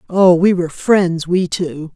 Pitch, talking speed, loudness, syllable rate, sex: 175 Hz, 185 wpm, -15 LUFS, 4.0 syllables/s, female